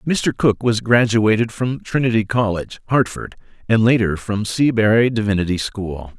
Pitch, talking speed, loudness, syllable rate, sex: 110 Hz, 135 wpm, -18 LUFS, 4.9 syllables/s, male